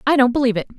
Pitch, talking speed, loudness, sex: 250 Hz, 305 wpm, -17 LUFS, female